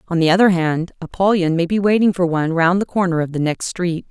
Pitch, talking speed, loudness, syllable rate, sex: 175 Hz, 250 wpm, -17 LUFS, 5.9 syllables/s, female